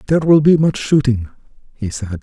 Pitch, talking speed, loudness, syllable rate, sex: 130 Hz, 190 wpm, -15 LUFS, 6.0 syllables/s, male